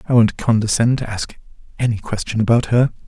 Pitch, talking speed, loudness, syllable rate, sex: 115 Hz, 175 wpm, -18 LUFS, 5.7 syllables/s, male